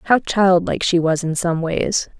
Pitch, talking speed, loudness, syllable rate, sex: 180 Hz, 190 wpm, -18 LUFS, 4.6 syllables/s, female